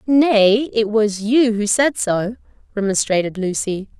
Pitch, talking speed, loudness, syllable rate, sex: 220 Hz, 135 wpm, -17 LUFS, 3.9 syllables/s, female